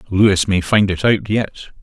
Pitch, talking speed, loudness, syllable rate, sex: 100 Hz, 195 wpm, -16 LUFS, 4.5 syllables/s, male